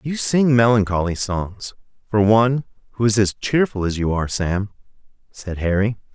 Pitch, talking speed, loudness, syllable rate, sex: 105 Hz, 155 wpm, -19 LUFS, 5.0 syllables/s, male